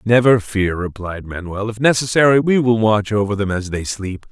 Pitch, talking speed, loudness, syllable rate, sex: 110 Hz, 195 wpm, -17 LUFS, 5.0 syllables/s, male